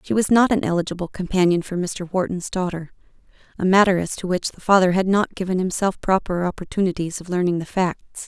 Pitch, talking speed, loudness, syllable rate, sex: 185 Hz, 190 wpm, -21 LUFS, 5.9 syllables/s, female